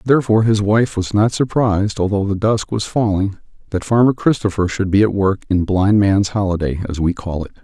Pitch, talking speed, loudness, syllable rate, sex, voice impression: 100 Hz, 205 wpm, -17 LUFS, 5.5 syllables/s, male, masculine, middle-aged, tensed, slightly muffled, fluent, intellectual, sincere, calm, slightly mature, friendly, reassuring, wild, slightly lively, kind